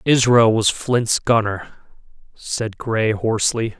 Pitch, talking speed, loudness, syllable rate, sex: 110 Hz, 110 wpm, -18 LUFS, 3.5 syllables/s, male